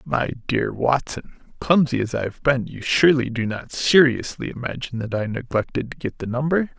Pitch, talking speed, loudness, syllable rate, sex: 125 Hz, 185 wpm, -21 LUFS, 5.4 syllables/s, male